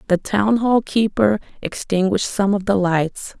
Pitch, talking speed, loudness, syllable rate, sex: 200 Hz, 160 wpm, -19 LUFS, 4.4 syllables/s, female